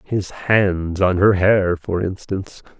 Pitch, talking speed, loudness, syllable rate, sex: 95 Hz, 150 wpm, -18 LUFS, 3.5 syllables/s, male